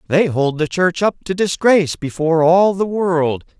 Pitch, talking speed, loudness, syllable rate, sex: 170 Hz, 185 wpm, -16 LUFS, 4.7 syllables/s, male